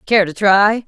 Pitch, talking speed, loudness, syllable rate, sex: 205 Hz, 205 wpm, -13 LUFS, 4.0 syllables/s, female